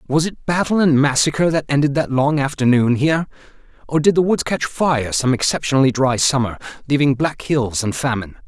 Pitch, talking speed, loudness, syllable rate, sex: 140 Hz, 185 wpm, -17 LUFS, 5.5 syllables/s, male